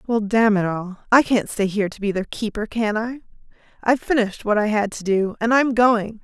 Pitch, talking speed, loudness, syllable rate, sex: 215 Hz, 240 wpm, -20 LUFS, 5.7 syllables/s, female